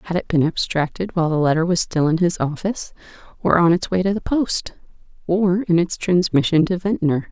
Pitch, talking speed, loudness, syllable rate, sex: 175 Hz, 190 wpm, -19 LUFS, 5.6 syllables/s, female